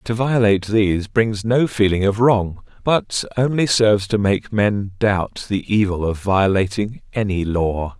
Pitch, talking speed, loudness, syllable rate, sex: 105 Hz, 160 wpm, -18 LUFS, 4.2 syllables/s, male